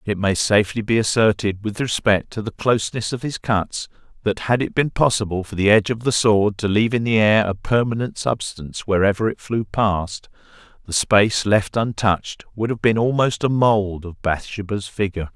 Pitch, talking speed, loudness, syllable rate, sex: 105 Hz, 190 wpm, -20 LUFS, 5.2 syllables/s, male